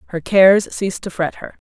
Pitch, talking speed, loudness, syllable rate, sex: 185 Hz, 215 wpm, -16 LUFS, 5.9 syllables/s, female